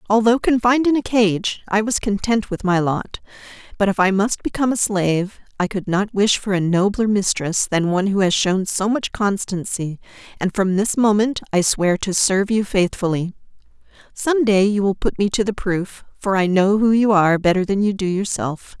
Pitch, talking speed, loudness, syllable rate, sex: 200 Hz, 205 wpm, -19 LUFS, 5.1 syllables/s, female